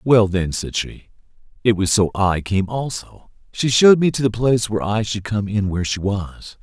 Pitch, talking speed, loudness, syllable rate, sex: 105 Hz, 215 wpm, -19 LUFS, 5.1 syllables/s, male